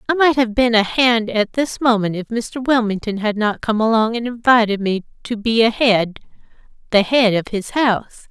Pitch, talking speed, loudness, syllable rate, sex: 225 Hz, 195 wpm, -17 LUFS, 4.9 syllables/s, female